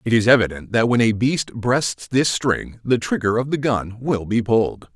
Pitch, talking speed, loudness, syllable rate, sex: 115 Hz, 220 wpm, -20 LUFS, 4.7 syllables/s, male